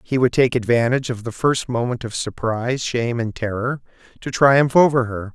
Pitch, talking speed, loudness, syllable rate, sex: 120 Hz, 190 wpm, -19 LUFS, 5.3 syllables/s, male